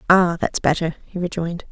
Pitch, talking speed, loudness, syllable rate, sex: 170 Hz, 175 wpm, -21 LUFS, 5.6 syllables/s, female